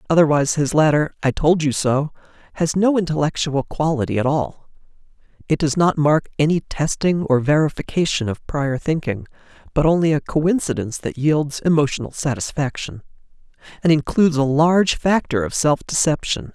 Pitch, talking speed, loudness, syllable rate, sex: 150 Hz, 140 wpm, -19 LUFS, 5.3 syllables/s, male